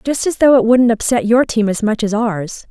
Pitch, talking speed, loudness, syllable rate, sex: 230 Hz, 265 wpm, -14 LUFS, 5.0 syllables/s, female